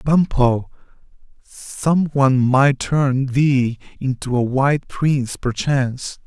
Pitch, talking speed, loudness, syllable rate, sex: 135 Hz, 105 wpm, -18 LUFS, 3.5 syllables/s, male